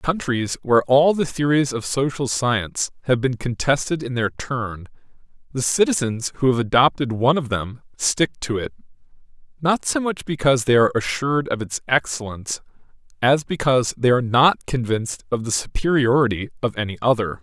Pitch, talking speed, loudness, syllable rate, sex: 130 Hz, 165 wpm, -20 LUFS, 5.5 syllables/s, male